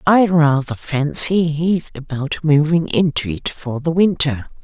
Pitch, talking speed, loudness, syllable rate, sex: 160 Hz, 140 wpm, -17 LUFS, 3.9 syllables/s, female